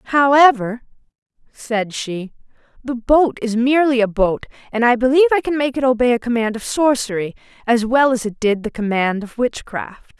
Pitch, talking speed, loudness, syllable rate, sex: 245 Hz, 175 wpm, -17 LUFS, 5.1 syllables/s, female